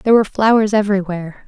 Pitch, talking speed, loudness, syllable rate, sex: 205 Hz, 165 wpm, -15 LUFS, 7.7 syllables/s, female